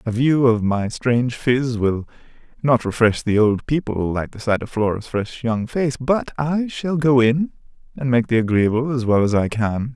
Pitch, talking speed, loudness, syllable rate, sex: 120 Hz, 205 wpm, -20 LUFS, 4.6 syllables/s, male